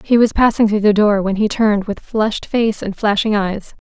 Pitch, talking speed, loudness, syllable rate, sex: 210 Hz, 230 wpm, -16 LUFS, 5.2 syllables/s, female